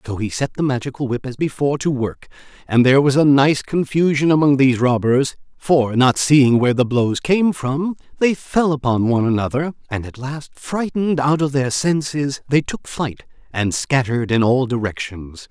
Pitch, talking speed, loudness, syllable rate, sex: 135 Hz, 185 wpm, -18 LUFS, 5.0 syllables/s, male